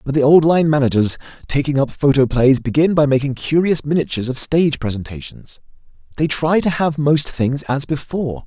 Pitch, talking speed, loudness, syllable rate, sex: 140 Hz, 170 wpm, -17 LUFS, 5.5 syllables/s, male